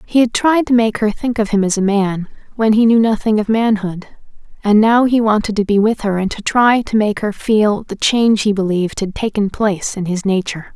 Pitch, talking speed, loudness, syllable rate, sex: 210 Hz, 240 wpm, -15 LUFS, 5.3 syllables/s, female